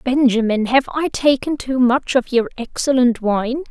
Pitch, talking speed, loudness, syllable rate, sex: 255 Hz, 160 wpm, -17 LUFS, 4.3 syllables/s, female